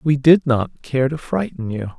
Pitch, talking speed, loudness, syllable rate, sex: 140 Hz, 210 wpm, -19 LUFS, 4.2 syllables/s, male